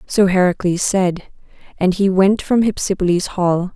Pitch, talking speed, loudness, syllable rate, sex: 185 Hz, 145 wpm, -16 LUFS, 4.4 syllables/s, female